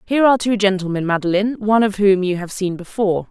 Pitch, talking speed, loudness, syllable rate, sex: 200 Hz, 220 wpm, -18 LUFS, 7.0 syllables/s, female